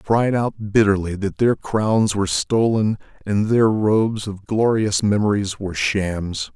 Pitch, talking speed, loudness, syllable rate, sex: 100 Hz, 155 wpm, -20 LUFS, 4.3 syllables/s, male